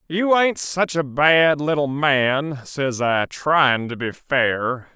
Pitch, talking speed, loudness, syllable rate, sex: 145 Hz, 160 wpm, -19 LUFS, 3.0 syllables/s, male